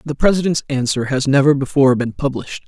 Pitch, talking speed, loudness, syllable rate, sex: 140 Hz, 180 wpm, -16 LUFS, 6.3 syllables/s, male